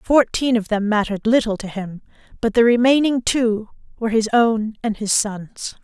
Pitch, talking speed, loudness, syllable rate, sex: 225 Hz, 175 wpm, -19 LUFS, 4.9 syllables/s, female